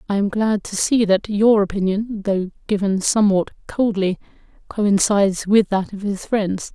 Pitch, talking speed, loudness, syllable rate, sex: 200 Hz, 160 wpm, -19 LUFS, 4.5 syllables/s, female